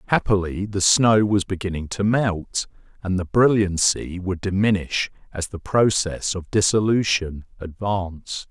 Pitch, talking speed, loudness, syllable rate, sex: 95 Hz, 125 wpm, -21 LUFS, 4.2 syllables/s, male